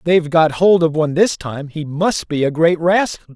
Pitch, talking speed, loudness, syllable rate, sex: 165 Hz, 250 wpm, -16 LUFS, 5.1 syllables/s, female